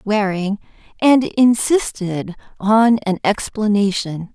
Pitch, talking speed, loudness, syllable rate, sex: 210 Hz, 85 wpm, -17 LUFS, 3.3 syllables/s, female